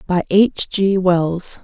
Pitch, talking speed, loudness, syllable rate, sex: 185 Hz, 145 wpm, -16 LUFS, 2.8 syllables/s, female